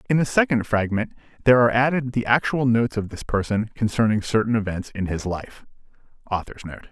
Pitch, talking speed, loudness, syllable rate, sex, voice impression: 115 Hz, 175 wpm, -22 LUFS, 6.2 syllables/s, male, masculine, middle-aged, thick, tensed, powerful, slightly bright, muffled, slightly raspy, cool, intellectual, calm, wild, strict